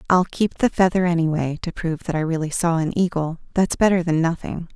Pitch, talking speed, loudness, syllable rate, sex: 170 Hz, 215 wpm, -21 LUFS, 5.8 syllables/s, female